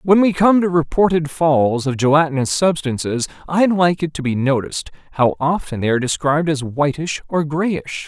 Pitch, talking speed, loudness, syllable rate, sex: 155 Hz, 180 wpm, -18 LUFS, 5.1 syllables/s, male